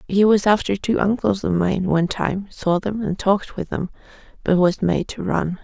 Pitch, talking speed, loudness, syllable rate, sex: 195 Hz, 215 wpm, -20 LUFS, 4.9 syllables/s, female